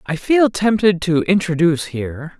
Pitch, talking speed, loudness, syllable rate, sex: 180 Hz, 150 wpm, -17 LUFS, 4.9 syllables/s, male